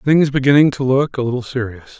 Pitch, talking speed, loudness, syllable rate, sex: 130 Hz, 210 wpm, -16 LUFS, 5.6 syllables/s, male